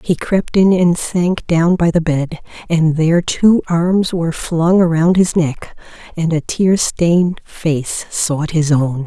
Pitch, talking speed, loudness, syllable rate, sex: 165 Hz, 170 wpm, -15 LUFS, 3.7 syllables/s, female